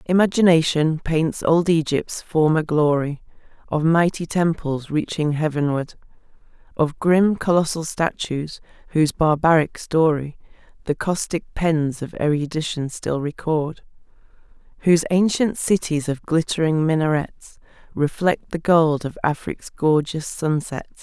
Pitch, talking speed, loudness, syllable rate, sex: 160 Hz, 110 wpm, -21 LUFS, 4.2 syllables/s, female